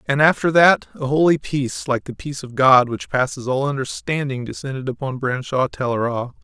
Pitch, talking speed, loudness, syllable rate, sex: 135 Hz, 175 wpm, -19 LUFS, 5.4 syllables/s, male